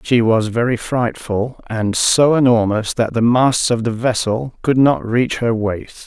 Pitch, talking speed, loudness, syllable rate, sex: 115 Hz, 180 wpm, -16 LUFS, 4.0 syllables/s, male